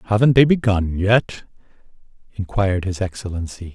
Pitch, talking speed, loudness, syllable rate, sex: 100 Hz, 110 wpm, -19 LUFS, 5.2 syllables/s, male